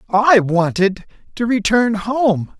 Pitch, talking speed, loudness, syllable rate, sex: 215 Hz, 115 wpm, -16 LUFS, 3.3 syllables/s, male